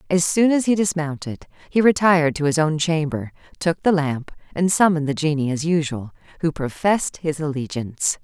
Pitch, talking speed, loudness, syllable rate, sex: 160 Hz, 175 wpm, -20 LUFS, 5.4 syllables/s, female